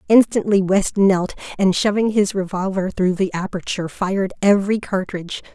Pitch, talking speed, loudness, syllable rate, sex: 195 Hz, 140 wpm, -19 LUFS, 5.3 syllables/s, female